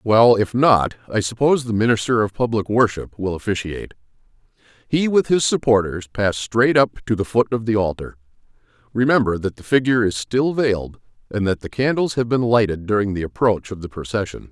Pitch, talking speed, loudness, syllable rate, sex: 110 Hz, 185 wpm, -19 LUFS, 5.6 syllables/s, male